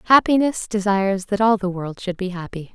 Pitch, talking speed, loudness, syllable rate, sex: 200 Hz, 195 wpm, -20 LUFS, 5.5 syllables/s, female